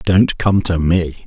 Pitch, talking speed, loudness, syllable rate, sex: 90 Hz, 190 wpm, -15 LUFS, 3.8 syllables/s, male